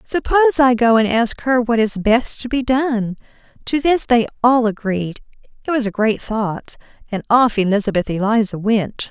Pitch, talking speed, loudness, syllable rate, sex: 230 Hz, 180 wpm, -17 LUFS, 4.7 syllables/s, female